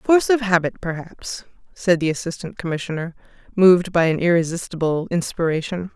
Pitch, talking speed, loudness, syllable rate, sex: 175 Hz, 130 wpm, -20 LUFS, 5.7 syllables/s, female